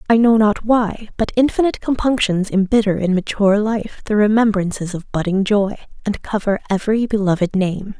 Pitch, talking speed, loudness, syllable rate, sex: 210 Hz, 160 wpm, -17 LUFS, 5.4 syllables/s, female